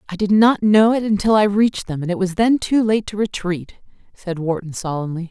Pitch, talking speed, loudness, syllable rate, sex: 195 Hz, 225 wpm, -18 LUFS, 5.4 syllables/s, female